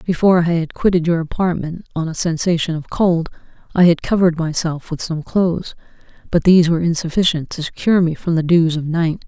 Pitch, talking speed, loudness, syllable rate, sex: 170 Hz, 195 wpm, -17 LUFS, 5.9 syllables/s, female